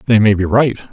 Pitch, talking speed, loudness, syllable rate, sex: 110 Hz, 260 wpm, -13 LUFS, 6.4 syllables/s, male